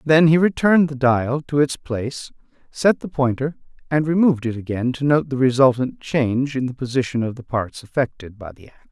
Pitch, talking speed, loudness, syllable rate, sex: 135 Hz, 200 wpm, -20 LUFS, 5.5 syllables/s, male